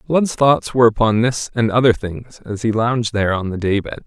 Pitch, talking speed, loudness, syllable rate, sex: 115 Hz, 235 wpm, -17 LUFS, 5.5 syllables/s, male